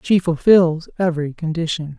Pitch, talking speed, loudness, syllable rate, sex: 165 Hz, 120 wpm, -18 LUFS, 5.0 syllables/s, female